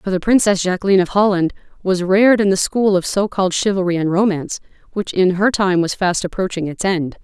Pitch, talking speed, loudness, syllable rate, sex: 190 Hz, 205 wpm, -17 LUFS, 6.0 syllables/s, female